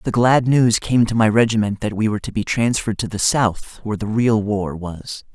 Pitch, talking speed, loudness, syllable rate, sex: 110 Hz, 235 wpm, -18 LUFS, 5.3 syllables/s, male